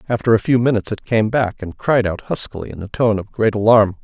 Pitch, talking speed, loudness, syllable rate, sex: 110 Hz, 255 wpm, -18 LUFS, 6.0 syllables/s, male